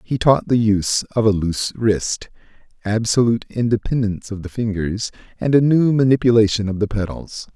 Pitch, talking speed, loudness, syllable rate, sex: 110 Hz, 160 wpm, -18 LUFS, 5.4 syllables/s, male